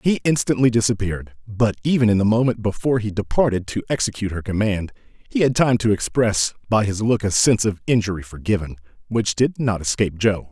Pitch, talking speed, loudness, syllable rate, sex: 105 Hz, 190 wpm, -20 LUFS, 6.0 syllables/s, male